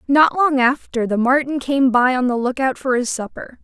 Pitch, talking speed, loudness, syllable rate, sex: 260 Hz, 230 wpm, -17 LUFS, 4.9 syllables/s, female